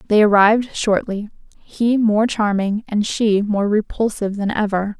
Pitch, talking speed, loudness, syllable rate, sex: 210 Hz, 145 wpm, -18 LUFS, 4.6 syllables/s, female